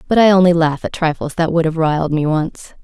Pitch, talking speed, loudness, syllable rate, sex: 165 Hz, 255 wpm, -15 LUFS, 5.8 syllables/s, female